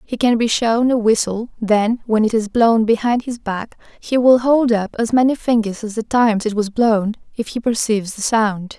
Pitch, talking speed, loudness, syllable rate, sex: 225 Hz, 220 wpm, -17 LUFS, 4.8 syllables/s, female